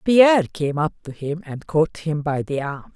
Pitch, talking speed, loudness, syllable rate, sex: 160 Hz, 225 wpm, -21 LUFS, 4.4 syllables/s, female